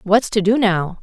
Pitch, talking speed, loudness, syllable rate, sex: 205 Hz, 235 wpm, -17 LUFS, 4.4 syllables/s, female